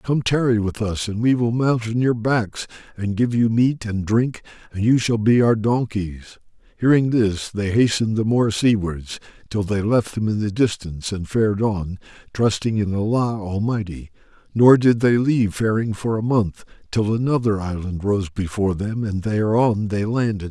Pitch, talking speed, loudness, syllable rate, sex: 110 Hz, 180 wpm, -20 LUFS, 4.7 syllables/s, male